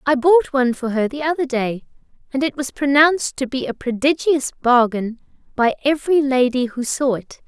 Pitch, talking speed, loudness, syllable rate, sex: 270 Hz, 185 wpm, -18 LUFS, 5.3 syllables/s, female